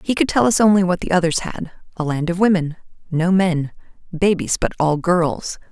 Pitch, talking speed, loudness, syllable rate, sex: 175 Hz, 170 wpm, -18 LUFS, 5.2 syllables/s, female